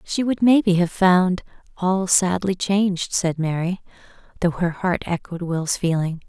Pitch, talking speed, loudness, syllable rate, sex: 180 Hz, 160 wpm, -21 LUFS, 4.2 syllables/s, female